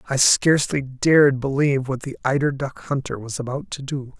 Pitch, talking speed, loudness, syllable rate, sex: 130 Hz, 185 wpm, -21 LUFS, 5.4 syllables/s, male